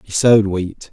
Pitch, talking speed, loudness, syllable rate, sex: 105 Hz, 195 wpm, -15 LUFS, 4.9 syllables/s, male